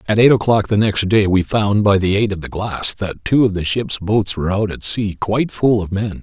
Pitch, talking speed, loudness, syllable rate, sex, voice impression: 105 Hz, 270 wpm, -17 LUFS, 5.1 syllables/s, male, very masculine, very adult-like, very thick, very tensed, very powerful, slightly dark, soft, very clear, fluent, very cool, very intellectual, very sincere, very calm, very mature, friendly, very reassuring, very unique, slightly elegant, very wild, sweet, very lively, kind, intense, slightly modest